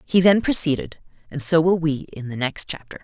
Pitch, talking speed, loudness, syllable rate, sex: 155 Hz, 220 wpm, -21 LUFS, 5.3 syllables/s, female